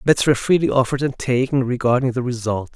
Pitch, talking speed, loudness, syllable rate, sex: 130 Hz, 195 wpm, -19 LUFS, 6.5 syllables/s, male